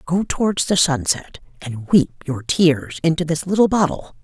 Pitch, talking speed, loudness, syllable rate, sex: 160 Hz, 170 wpm, -19 LUFS, 4.6 syllables/s, female